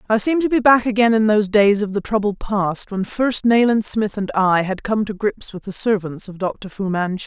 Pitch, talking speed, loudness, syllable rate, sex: 210 Hz, 250 wpm, -18 LUFS, 5.2 syllables/s, female